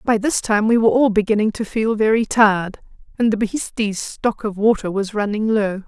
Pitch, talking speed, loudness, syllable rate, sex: 215 Hz, 205 wpm, -18 LUFS, 5.2 syllables/s, female